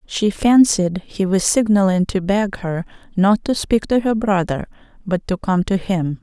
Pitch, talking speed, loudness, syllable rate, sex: 195 Hz, 185 wpm, -18 LUFS, 4.3 syllables/s, female